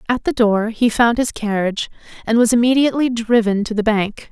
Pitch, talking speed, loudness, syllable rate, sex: 225 Hz, 195 wpm, -17 LUFS, 5.6 syllables/s, female